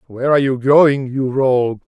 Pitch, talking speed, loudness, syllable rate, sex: 130 Hz, 185 wpm, -15 LUFS, 5.3 syllables/s, male